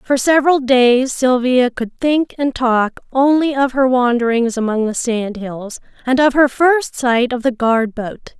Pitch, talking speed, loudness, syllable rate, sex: 250 Hz, 180 wpm, -15 LUFS, 4.0 syllables/s, female